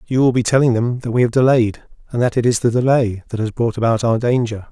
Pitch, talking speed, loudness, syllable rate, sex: 120 Hz, 265 wpm, -17 LUFS, 6.1 syllables/s, male